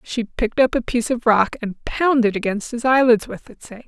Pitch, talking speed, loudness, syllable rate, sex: 230 Hz, 230 wpm, -19 LUFS, 5.3 syllables/s, female